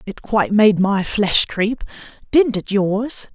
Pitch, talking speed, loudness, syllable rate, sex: 210 Hz, 160 wpm, -17 LUFS, 3.7 syllables/s, female